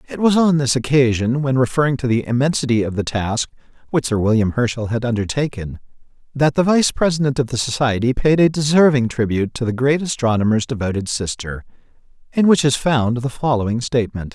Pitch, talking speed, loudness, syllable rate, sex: 125 Hz, 180 wpm, -18 LUFS, 5.8 syllables/s, male